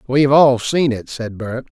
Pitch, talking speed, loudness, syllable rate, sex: 130 Hz, 200 wpm, -16 LUFS, 4.6 syllables/s, male